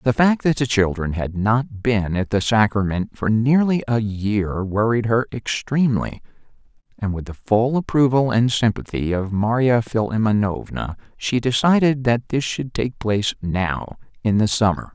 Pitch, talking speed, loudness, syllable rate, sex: 115 Hz, 155 wpm, -20 LUFS, 4.4 syllables/s, male